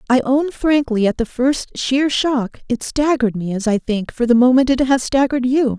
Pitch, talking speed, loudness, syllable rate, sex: 255 Hz, 220 wpm, -17 LUFS, 5.0 syllables/s, female